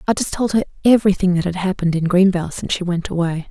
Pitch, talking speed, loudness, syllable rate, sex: 185 Hz, 240 wpm, -18 LUFS, 7.3 syllables/s, female